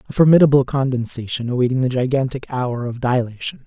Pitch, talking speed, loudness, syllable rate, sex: 130 Hz, 145 wpm, -18 LUFS, 6.1 syllables/s, male